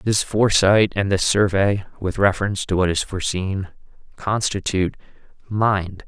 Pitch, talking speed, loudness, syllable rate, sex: 100 Hz, 130 wpm, -20 LUFS, 4.8 syllables/s, male